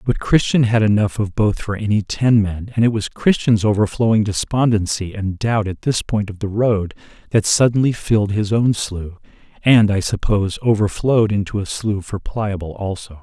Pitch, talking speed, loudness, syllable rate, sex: 105 Hz, 180 wpm, -18 LUFS, 5.0 syllables/s, male